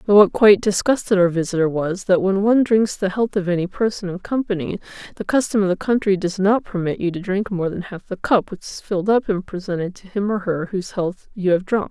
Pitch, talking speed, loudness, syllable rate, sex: 195 Hz, 245 wpm, -20 LUFS, 5.8 syllables/s, female